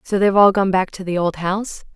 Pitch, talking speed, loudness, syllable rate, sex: 190 Hz, 275 wpm, -17 LUFS, 6.3 syllables/s, female